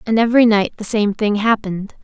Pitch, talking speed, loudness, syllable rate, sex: 215 Hz, 205 wpm, -16 LUFS, 6.0 syllables/s, female